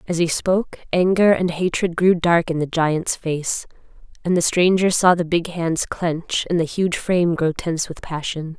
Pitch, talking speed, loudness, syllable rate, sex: 170 Hz, 195 wpm, -20 LUFS, 4.6 syllables/s, female